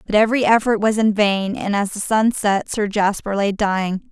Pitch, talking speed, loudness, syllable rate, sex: 205 Hz, 220 wpm, -18 LUFS, 5.1 syllables/s, female